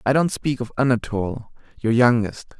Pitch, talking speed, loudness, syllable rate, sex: 120 Hz, 160 wpm, -21 LUFS, 5.3 syllables/s, male